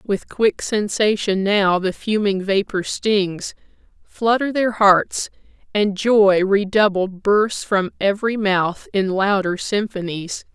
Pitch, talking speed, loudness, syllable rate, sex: 200 Hz, 120 wpm, -19 LUFS, 3.5 syllables/s, female